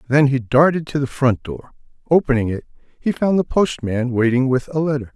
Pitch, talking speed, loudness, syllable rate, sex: 135 Hz, 200 wpm, -18 LUFS, 5.4 syllables/s, male